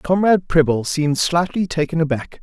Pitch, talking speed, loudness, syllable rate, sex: 160 Hz, 150 wpm, -18 LUFS, 5.5 syllables/s, male